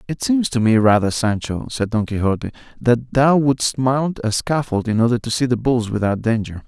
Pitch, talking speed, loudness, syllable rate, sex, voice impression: 120 Hz, 205 wpm, -18 LUFS, 5.0 syllables/s, male, very masculine, slightly adult-like, slightly thick, tensed, powerful, bright, soft, clear, fluent, cool, very intellectual, refreshing, very sincere, very calm, slightly mature, very friendly, very reassuring, unique, very elegant, slightly wild, very sweet, lively, very kind, slightly modest